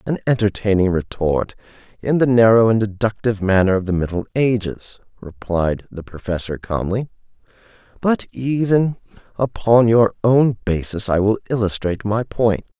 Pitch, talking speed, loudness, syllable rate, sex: 105 Hz, 130 wpm, -18 LUFS, 4.8 syllables/s, male